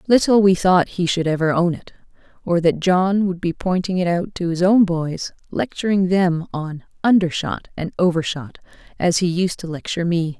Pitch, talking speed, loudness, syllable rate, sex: 175 Hz, 185 wpm, -19 LUFS, 4.9 syllables/s, female